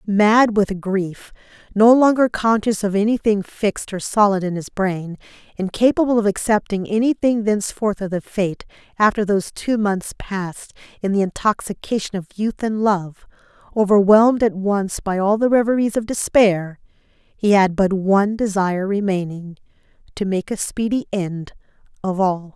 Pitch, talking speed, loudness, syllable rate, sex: 205 Hz, 145 wpm, -19 LUFS, 4.7 syllables/s, female